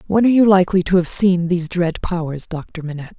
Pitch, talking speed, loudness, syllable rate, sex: 175 Hz, 225 wpm, -16 LUFS, 6.6 syllables/s, female